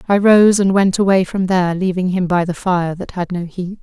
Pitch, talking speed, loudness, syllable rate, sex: 185 Hz, 250 wpm, -15 LUFS, 5.2 syllables/s, female